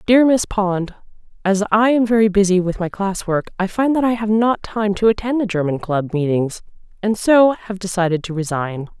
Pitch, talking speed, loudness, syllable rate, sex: 200 Hz, 205 wpm, -18 LUFS, 5.1 syllables/s, female